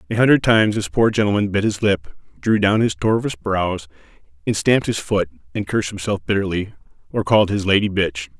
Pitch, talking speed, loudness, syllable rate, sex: 100 Hz, 195 wpm, -19 LUFS, 6.0 syllables/s, male